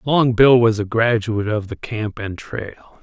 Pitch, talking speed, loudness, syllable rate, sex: 110 Hz, 200 wpm, -18 LUFS, 4.1 syllables/s, male